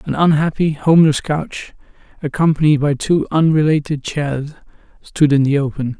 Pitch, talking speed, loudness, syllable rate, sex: 150 Hz, 130 wpm, -16 LUFS, 4.9 syllables/s, male